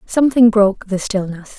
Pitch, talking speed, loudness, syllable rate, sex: 210 Hz, 150 wpm, -15 LUFS, 5.4 syllables/s, female